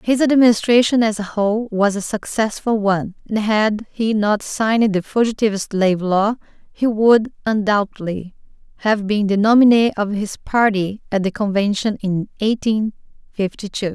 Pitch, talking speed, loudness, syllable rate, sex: 210 Hz, 150 wpm, -18 LUFS, 4.8 syllables/s, female